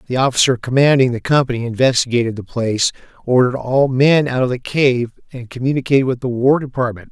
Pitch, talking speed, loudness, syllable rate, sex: 125 Hz, 175 wpm, -16 LUFS, 6.3 syllables/s, male